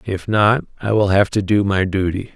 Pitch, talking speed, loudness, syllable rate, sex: 100 Hz, 205 wpm, -17 LUFS, 4.8 syllables/s, male